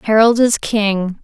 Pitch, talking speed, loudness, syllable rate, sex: 215 Hz, 145 wpm, -14 LUFS, 3.4 syllables/s, female